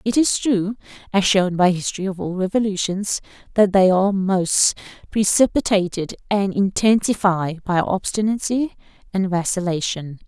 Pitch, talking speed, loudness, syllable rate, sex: 195 Hz, 130 wpm, -20 LUFS, 4.8 syllables/s, female